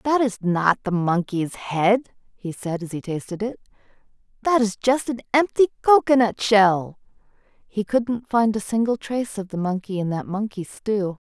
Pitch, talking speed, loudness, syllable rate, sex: 210 Hz, 170 wpm, -22 LUFS, 4.4 syllables/s, female